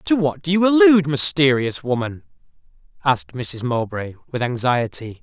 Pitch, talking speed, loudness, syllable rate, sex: 135 Hz, 140 wpm, -19 LUFS, 4.9 syllables/s, male